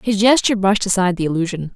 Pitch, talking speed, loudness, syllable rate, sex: 195 Hz, 205 wpm, -17 LUFS, 7.6 syllables/s, female